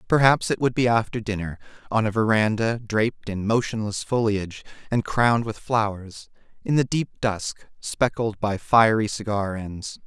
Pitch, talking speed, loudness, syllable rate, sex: 110 Hz, 155 wpm, -23 LUFS, 4.8 syllables/s, male